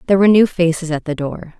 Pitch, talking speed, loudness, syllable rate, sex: 170 Hz, 265 wpm, -16 LUFS, 7.2 syllables/s, female